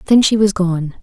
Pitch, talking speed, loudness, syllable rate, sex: 195 Hz, 235 wpm, -14 LUFS, 5.1 syllables/s, female